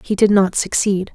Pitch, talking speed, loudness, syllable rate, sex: 195 Hz, 210 wpm, -16 LUFS, 4.8 syllables/s, female